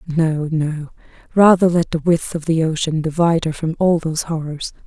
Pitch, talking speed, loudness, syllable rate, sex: 160 Hz, 185 wpm, -18 LUFS, 5.1 syllables/s, female